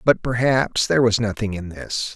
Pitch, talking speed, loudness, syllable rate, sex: 110 Hz, 195 wpm, -20 LUFS, 4.9 syllables/s, male